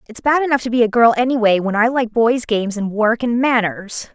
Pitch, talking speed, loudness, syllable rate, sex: 230 Hz, 245 wpm, -16 LUFS, 5.6 syllables/s, female